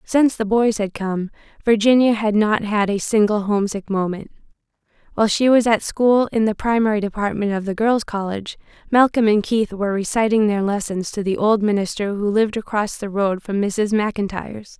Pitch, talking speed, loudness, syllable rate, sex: 210 Hz, 185 wpm, -19 LUFS, 5.4 syllables/s, female